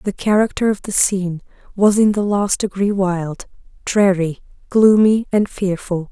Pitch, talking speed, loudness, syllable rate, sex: 195 Hz, 145 wpm, -17 LUFS, 4.4 syllables/s, female